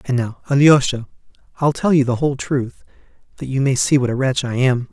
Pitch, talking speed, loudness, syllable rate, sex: 135 Hz, 220 wpm, -17 LUFS, 5.9 syllables/s, male